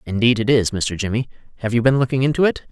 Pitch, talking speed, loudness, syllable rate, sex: 120 Hz, 220 wpm, -19 LUFS, 6.7 syllables/s, male